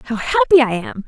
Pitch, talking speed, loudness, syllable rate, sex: 220 Hz, 225 wpm, -15 LUFS, 7.3 syllables/s, female